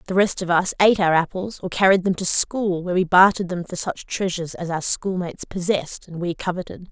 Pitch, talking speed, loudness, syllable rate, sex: 180 Hz, 225 wpm, -21 LUFS, 6.0 syllables/s, female